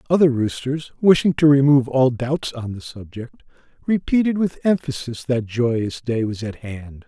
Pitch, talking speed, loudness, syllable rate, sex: 130 Hz, 160 wpm, -19 LUFS, 4.7 syllables/s, male